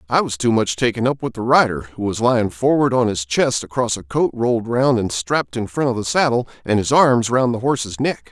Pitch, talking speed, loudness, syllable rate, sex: 115 Hz, 255 wpm, -18 LUFS, 5.6 syllables/s, male